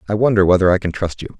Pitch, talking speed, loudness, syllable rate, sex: 100 Hz, 300 wpm, -16 LUFS, 7.5 syllables/s, male